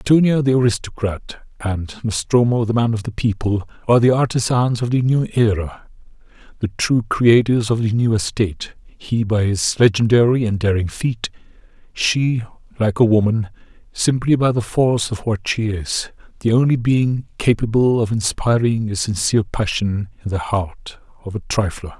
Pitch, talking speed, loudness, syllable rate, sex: 110 Hz, 160 wpm, -18 LUFS, 4.8 syllables/s, male